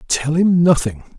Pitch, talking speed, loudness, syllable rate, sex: 155 Hz, 150 wpm, -15 LUFS, 4.4 syllables/s, male